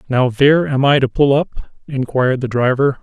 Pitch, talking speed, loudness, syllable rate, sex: 135 Hz, 200 wpm, -15 LUFS, 5.7 syllables/s, male